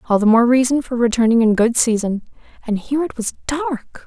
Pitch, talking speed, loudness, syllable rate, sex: 245 Hz, 205 wpm, -17 LUFS, 5.7 syllables/s, female